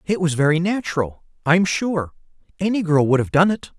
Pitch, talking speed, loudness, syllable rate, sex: 170 Hz, 190 wpm, -20 LUFS, 5.4 syllables/s, male